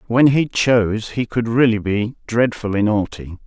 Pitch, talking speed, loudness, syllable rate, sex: 110 Hz, 155 wpm, -18 LUFS, 4.5 syllables/s, male